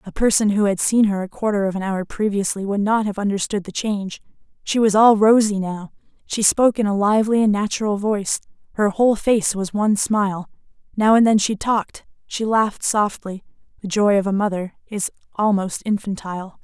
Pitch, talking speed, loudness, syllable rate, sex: 205 Hz, 190 wpm, -19 LUFS, 5.6 syllables/s, female